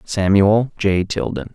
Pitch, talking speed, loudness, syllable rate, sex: 100 Hz, 115 wpm, -17 LUFS, 3.6 syllables/s, male